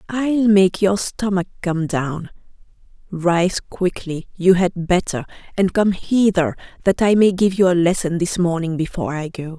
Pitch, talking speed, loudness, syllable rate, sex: 180 Hz, 165 wpm, -18 LUFS, 4.4 syllables/s, female